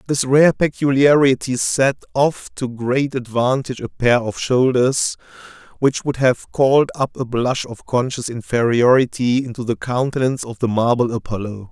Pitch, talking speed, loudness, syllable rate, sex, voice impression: 125 Hz, 150 wpm, -18 LUFS, 4.6 syllables/s, male, masculine, adult-like, slightly fluent, cool, refreshing, slightly sincere